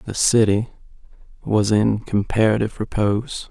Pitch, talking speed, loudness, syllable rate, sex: 110 Hz, 105 wpm, -19 LUFS, 5.0 syllables/s, male